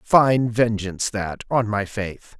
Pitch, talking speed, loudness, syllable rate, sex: 110 Hz, 150 wpm, -22 LUFS, 3.6 syllables/s, male